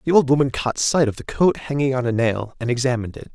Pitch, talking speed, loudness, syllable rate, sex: 130 Hz, 270 wpm, -20 LUFS, 6.3 syllables/s, male